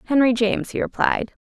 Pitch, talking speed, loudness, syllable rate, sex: 250 Hz, 170 wpm, -21 LUFS, 6.0 syllables/s, female